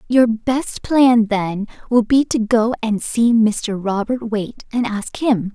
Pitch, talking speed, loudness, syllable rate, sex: 225 Hz, 175 wpm, -18 LUFS, 3.6 syllables/s, female